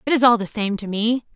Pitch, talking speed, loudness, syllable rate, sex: 220 Hz, 310 wpm, -20 LUFS, 6.0 syllables/s, female